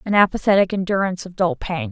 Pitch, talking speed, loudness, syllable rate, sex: 190 Hz, 190 wpm, -19 LUFS, 6.6 syllables/s, female